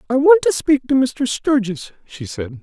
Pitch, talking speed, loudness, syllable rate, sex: 225 Hz, 205 wpm, -17 LUFS, 4.5 syllables/s, male